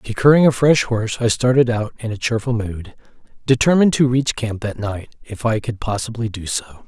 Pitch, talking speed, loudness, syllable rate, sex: 115 Hz, 200 wpm, -18 LUFS, 5.6 syllables/s, male